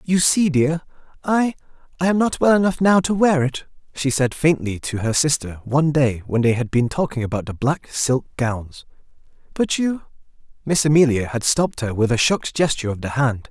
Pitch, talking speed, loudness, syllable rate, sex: 140 Hz, 195 wpm, -19 LUFS, 5.3 syllables/s, male